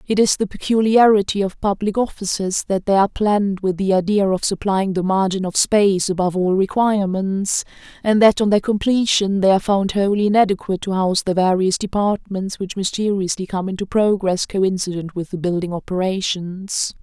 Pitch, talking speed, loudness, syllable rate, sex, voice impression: 195 Hz, 170 wpm, -18 LUFS, 5.4 syllables/s, female, feminine, adult-like, tensed, powerful, clear, fluent, intellectual, friendly, slightly unique, lively, slightly sharp